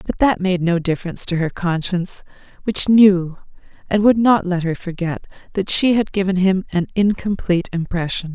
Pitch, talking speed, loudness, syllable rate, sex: 185 Hz, 175 wpm, -18 LUFS, 5.3 syllables/s, female